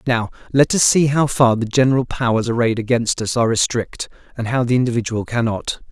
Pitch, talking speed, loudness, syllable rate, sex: 120 Hz, 195 wpm, -18 LUFS, 5.8 syllables/s, male